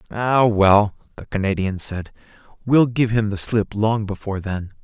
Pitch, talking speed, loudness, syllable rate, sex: 105 Hz, 160 wpm, -20 LUFS, 4.5 syllables/s, male